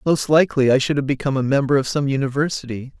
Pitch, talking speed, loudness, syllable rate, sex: 140 Hz, 220 wpm, -19 LUFS, 7.0 syllables/s, male